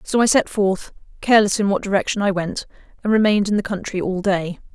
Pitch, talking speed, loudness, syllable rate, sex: 200 Hz, 215 wpm, -19 LUFS, 6.1 syllables/s, female